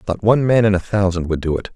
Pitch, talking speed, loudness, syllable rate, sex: 100 Hz, 310 wpm, -17 LUFS, 7.0 syllables/s, male